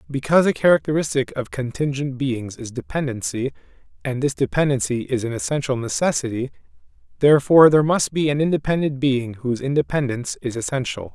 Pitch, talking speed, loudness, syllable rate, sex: 135 Hz, 140 wpm, -21 LUFS, 6.1 syllables/s, male